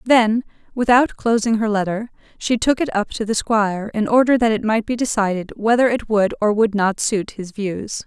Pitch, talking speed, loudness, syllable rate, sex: 220 Hz, 210 wpm, -19 LUFS, 5.0 syllables/s, female